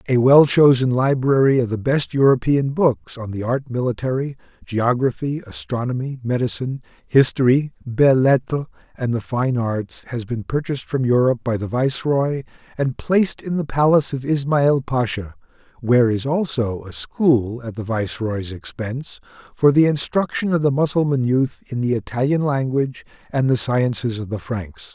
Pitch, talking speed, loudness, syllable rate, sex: 130 Hz, 155 wpm, -20 LUFS, 5.0 syllables/s, male